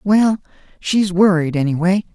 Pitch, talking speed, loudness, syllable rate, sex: 185 Hz, 110 wpm, -16 LUFS, 4.5 syllables/s, male